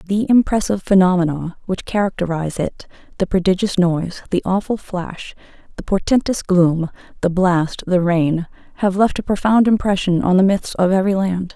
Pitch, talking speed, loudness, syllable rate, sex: 185 Hz, 155 wpm, -18 LUFS, 5.2 syllables/s, female